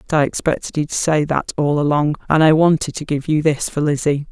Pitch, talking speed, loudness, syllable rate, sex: 150 Hz, 235 wpm, -17 LUFS, 5.6 syllables/s, female